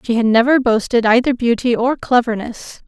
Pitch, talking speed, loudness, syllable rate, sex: 235 Hz, 165 wpm, -15 LUFS, 5.2 syllables/s, female